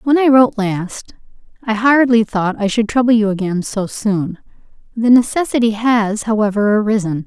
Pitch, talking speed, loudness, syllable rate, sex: 220 Hz, 155 wpm, -15 LUFS, 4.9 syllables/s, female